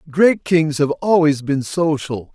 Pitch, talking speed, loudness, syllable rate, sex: 150 Hz, 155 wpm, -17 LUFS, 3.7 syllables/s, male